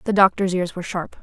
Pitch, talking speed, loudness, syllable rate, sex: 185 Hz, 245 wpm, -21 LUFS, 6.5 syllables/s, female